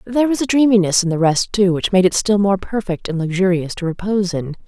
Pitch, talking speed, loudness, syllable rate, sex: 195 Hz, 245 wpm, -17 LUFS, 6.0 syllables/s, female